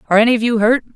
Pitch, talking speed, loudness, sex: 230 Hz, 315 wpm, -14 LUFS, female